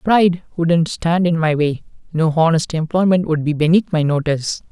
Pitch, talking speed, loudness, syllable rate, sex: 165 Hz, 180 wpm, -17 LUFS, 5.1 syllables/s, male